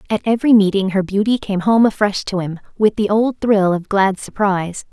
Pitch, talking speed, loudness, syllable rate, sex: 200 Hz, 205 wpm, -16 LUFS, 5.4 syllables/s, female